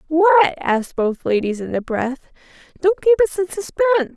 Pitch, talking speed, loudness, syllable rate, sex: 315 Hz, 175 wpm, -18 LUFS, 5.5 syllables/s, female